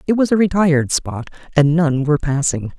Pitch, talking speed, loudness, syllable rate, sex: 160 Hz, 195 wpm, -16 LUFS, 5.6 syllables/s, male